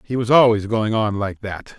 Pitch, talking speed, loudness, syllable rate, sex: 110 Hz, 235 wpm, -18 LUFS, 4.7 syllables/s, male